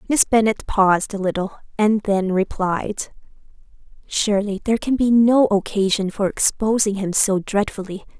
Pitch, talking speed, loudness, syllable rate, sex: 205 Hz, 140 wpm, -19 LUFS, 4.8 syllables/s, female